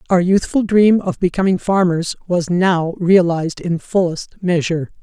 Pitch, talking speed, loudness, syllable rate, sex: 180 Hz, 145 wpm, -16 LUFS, 4.7 syllables/s, female